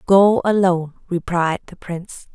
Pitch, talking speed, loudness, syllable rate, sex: 180 Hz, 130 wpm, -19 LUFS, 4.7 syllables/s, female